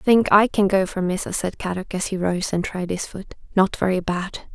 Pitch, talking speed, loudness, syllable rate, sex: 190 Hz, 240 wpm, -22 LUFS, 4.9 syllables/s, female